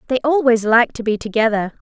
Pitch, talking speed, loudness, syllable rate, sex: 235 Hz, 190 wpm, -17 LUFS, 5.7 syllables/s, female